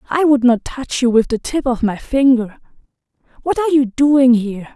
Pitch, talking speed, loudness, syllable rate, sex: 255 Hz, 200 wpm, -15 LUFS, 5.2 syllables/s, female